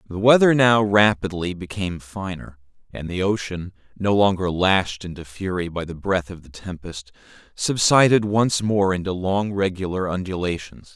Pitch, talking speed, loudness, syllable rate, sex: 95 Hz, 150 wpm, -21 LUFS, 4.7 syllables/s, male